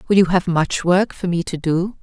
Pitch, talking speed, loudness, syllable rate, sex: 180 Hz, 265 wpm, -18 LUFS, 5.0 syllables/s, female